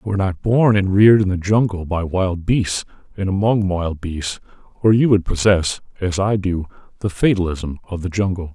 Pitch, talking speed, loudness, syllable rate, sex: 95 Hz, 195 wpm, -18 LUFS, 5.1 syllables/s, male